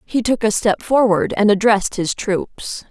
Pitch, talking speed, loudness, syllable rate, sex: 210 Hz, 185 wpm, -17 LUFS, 4.4 syllables/s, female